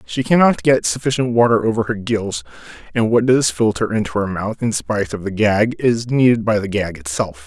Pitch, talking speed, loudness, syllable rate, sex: 110 Hz, 210 wpm, -17 LUFS, 5.3 syllables/s, male